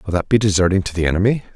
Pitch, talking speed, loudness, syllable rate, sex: 100 Hz, 270 wpm, -17 LUFS, 7.7 syllables/s, male